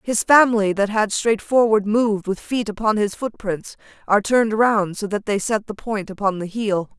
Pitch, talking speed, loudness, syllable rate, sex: 210 Hz, 205 wpm, -20 LUFS, 5.1 syllables/s, female